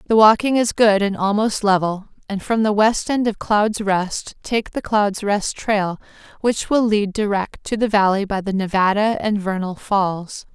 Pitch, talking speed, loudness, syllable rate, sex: 205 Hz, 190 wpm, -19 LUFS, 4.3 syllables/s, female